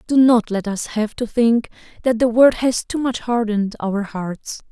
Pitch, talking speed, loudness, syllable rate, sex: 225 Hz, 205 wpm, -19 LUFS, 4.4 syllables/s, female